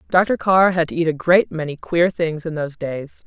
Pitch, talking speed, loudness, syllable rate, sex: 165 Hz, 240 wpm, -19 LUFS, 4.9 syllables/s, female